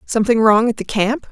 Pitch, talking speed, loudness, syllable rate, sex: 225 Hz, 225 wpm, -16 LUFS, 5.8 syllables/s, female